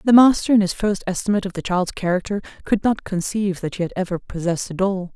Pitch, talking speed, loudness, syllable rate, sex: 190 Hz, 235 wpm, -21 LUFS, 6.5 syllables/s, female